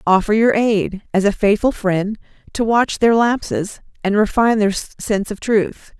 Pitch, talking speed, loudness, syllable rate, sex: 210 Hz, 170 wpm, -17 LUFS, 4.4 syllables/s, female